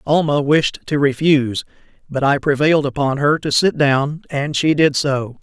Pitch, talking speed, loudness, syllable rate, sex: 145 Hz, 175 wpm, -17 LUFS, 4.7 syllables/s, male